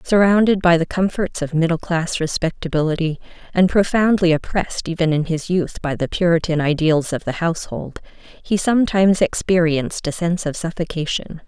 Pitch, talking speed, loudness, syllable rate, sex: 170 Hz, 150 wpm, -19 LUFS, 5.3 syllables/s, female